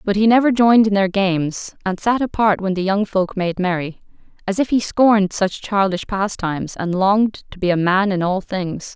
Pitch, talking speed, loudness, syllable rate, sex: 195 Hz, 215 wpm, -18 LUFS, 5.1 syllables/s, female